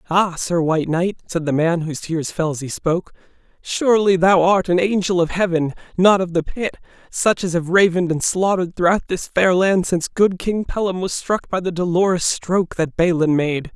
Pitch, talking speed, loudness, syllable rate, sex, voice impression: 175 Hz, 205 wpm, -19 LUFS, 5.3 syllables/s, male, masculine, adult-like, slightly powerful, very fluent, refreshing, slightly unique